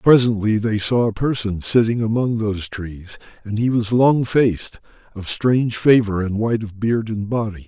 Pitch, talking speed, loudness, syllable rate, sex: 110 Hz, 180 wpm, -19 LUFS, 4.8 syllables/s, male